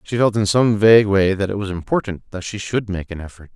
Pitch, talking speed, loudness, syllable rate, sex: 100 Hz, 270 wpm, -18 LUFS, 5.8 syllables/s, male